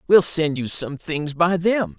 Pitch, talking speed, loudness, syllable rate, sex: 160 Hz, 210 wpm, -21 LUFS, 3.9 syllables/s, male